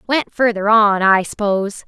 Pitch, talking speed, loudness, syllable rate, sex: 210 Hz, 160 wpm, -15 LUFS, 4.1 syllables/s, female